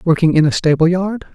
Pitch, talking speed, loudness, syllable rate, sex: 170 Hz, 225 wpm, -15 LUFS, 5.9 syllables/s, female